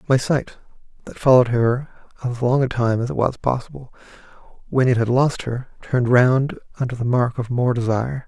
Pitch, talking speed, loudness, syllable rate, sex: 125 Hz, 190 wpm, -20 LUFS, 5.5 syllables/s, male